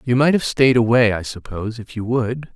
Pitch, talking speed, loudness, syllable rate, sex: 120 Hz, 235 wpm, -18 LUFS, 5.3 syllables/s, male